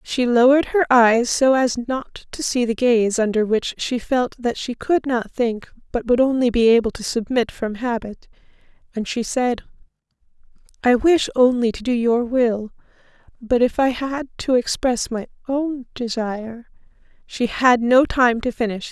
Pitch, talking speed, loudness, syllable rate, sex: 240 Hz, 170 wpm, -19 LUFS, 4.5 syllables/s, female